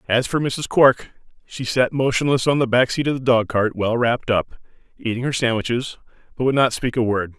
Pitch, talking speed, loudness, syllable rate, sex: 125 Hz, 210 wpm, -20 LUFS, 5.4 syllables/s, male